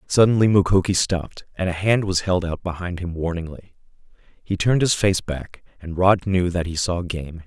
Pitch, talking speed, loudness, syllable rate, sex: 90 Hz, 195 wpm, -21 LUFS, 5.1 syllables/s, male